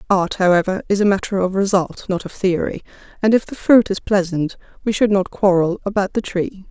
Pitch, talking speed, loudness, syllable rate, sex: 195 Hz, 205 wpm, -18 LUFS, 5.4 syllables/s, female